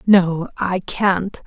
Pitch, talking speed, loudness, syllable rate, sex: 185 Hz, 125 wpm, -19 LUFS, 2.4 syllables/s, female